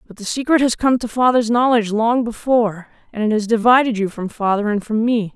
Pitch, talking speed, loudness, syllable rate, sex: 225 Hz, 225 wpm, -17 LUFS, 5.9 syllables/s, female